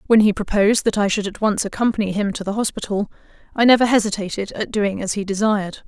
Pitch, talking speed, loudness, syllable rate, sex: 205 Hz, 215 wpm, -19 LUFS, 6.5 syllables/s, female